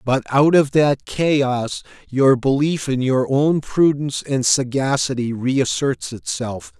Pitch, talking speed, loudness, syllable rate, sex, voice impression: 135 Hz, 135 wpm, -19 LUFS, 3.6 syllables/s, male, masculine, middle-aged, thick, relaxed, powerful, slightly hard, slightly muffled, cool, intellectual, calm, mature, slightly friendly, reassuring, wild, lively, slightly strict